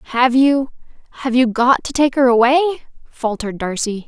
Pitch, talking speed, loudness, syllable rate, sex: 250 Hz, 145 wpm, -16 LUFS, 5.3 syllables/s, female